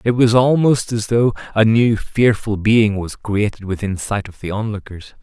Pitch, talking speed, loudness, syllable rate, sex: 110 Hz, 185 wpm, -17 LUFS, 4.5 syllables/s, male